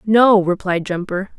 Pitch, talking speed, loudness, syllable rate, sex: 195 Hz, 130 wpm, -17 LUFS, 4.0 syllables/s, female